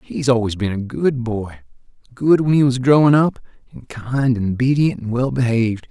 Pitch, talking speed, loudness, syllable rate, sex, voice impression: 125 Hz, 185 wpm, -17 LUFS, 4.8 syllables/s, male, masculine, middle-aged, slightly thick, cool, sincere, calm